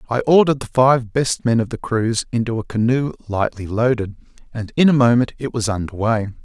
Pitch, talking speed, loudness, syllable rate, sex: 120 Hz, 205 wpm, -18 LUFS, 5.5 syllables/s, male